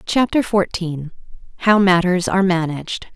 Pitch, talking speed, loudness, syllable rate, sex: 185 Hz, 115 wpm, -18 LUFS, 4.8 syllables/s, female